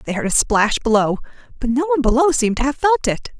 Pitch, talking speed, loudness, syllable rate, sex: 260 Hz, 250 wpm, -17 LUFS, 6.3 syllables/s, female